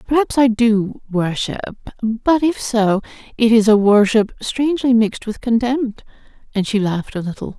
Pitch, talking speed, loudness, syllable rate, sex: 225 Hz, 160 wpm, -17 LUFS, 4.7 syllables/s, female